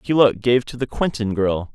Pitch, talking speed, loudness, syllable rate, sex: 115 Hz, 205 wpm, -20 LUFS, 4.7 syllables/s, male